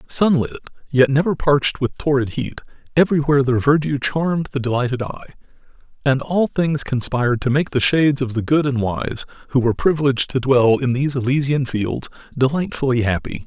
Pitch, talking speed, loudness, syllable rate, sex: 135 Hz, 170 wpm, -19 LUFS, 5.9 syllables/s, male